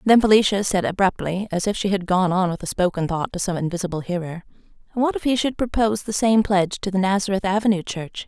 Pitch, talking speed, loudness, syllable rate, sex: 195 Hz, 230 wpm, -21 LUFS, 6.3 syllables/s, female